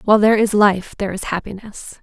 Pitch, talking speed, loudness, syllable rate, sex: 205 Hz, 205 wpm, -17 LUFS, 6.5 syllables/s, female